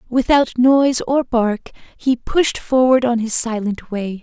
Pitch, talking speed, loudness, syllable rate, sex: 245 Hz, 155 wpm, -17 LUFS, 4.0 syllables/s, female